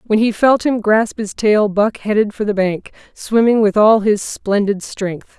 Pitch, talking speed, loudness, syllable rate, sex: 210 Hz, 200 wpm, -15 LUFS, 4.1 syllables/s, female